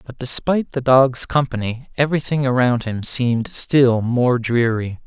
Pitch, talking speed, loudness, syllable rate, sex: 125 Hz, 140 wpm, -18 LUFS, 4.6 syllables/s, male